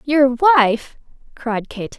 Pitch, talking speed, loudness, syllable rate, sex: 260 Hz, 120 wpm, -16 LUFS, 4.0 syllables/s, female